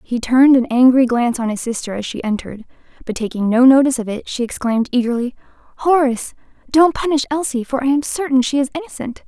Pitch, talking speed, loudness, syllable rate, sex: 255 Hz, 200 wpm, -17 LUFS, 6.6 syllables/s, female